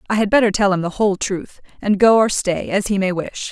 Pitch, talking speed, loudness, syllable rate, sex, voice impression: 200 Hz, 275 wpm, -18 LUFS, 5.8 syllables/s, female, feminine, adult-like, tensed, slightly hard, fluent, intellectual, calm, slightly friendly, elegant, sharp